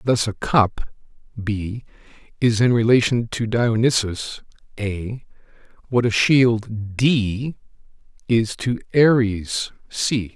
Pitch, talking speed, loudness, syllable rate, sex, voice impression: 115 Hz, 105 wpm, -20 LUFS, 4.1 syllables/s, male, very masculine, very adult-like, slightly old, very thick, slightly relaxed, slightly weak, slightly dark, hard, slightly muffled, slightly halting, slightly raspy, slightly cool, intellectual, sincere, calm, mature, slightly reassuring, wild, kind, modest